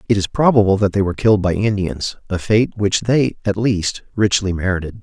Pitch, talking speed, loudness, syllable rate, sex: 100 Hz, 205 wpm, -17 LUFS, 5.5 syllables/s, male